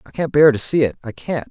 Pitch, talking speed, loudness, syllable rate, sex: 130 Hz, 280 wpm, -17 LUFS, 6.1 syllables/s, male